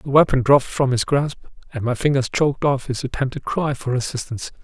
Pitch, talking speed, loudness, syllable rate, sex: 135 Hz, 205 wpm, -20 LUFS, 5.9 syllables/s, male